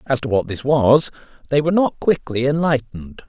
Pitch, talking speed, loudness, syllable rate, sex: 135 Hz, 185 wpm, -18 LUFS, 5.5 syllables/s, male